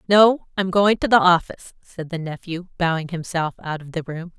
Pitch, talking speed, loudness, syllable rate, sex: 175 Hz, 205 wpm, -20 LUFS, 5.2 syllables/s, female